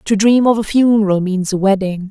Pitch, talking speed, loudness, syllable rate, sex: 205 Hz, 230 wpm, -14 LUFS, 5.5 syllables/s, female